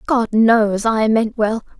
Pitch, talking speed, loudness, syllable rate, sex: 220 Hz, 165 wpm, -16 LUFS, 3.3 syllables/s, female